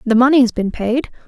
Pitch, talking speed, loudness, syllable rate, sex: 240 Hz, 235 wpm, -15 LUFS, 5.8 syllables/s, female